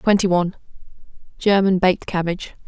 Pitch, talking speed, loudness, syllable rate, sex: 185 Hz, 90 wpm, -19 LUFS, 6.4 syllables/s, female